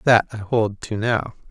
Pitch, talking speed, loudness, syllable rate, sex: 110 Hz, 200 wpm, -21 LUFS, 4.1 syllables/s, male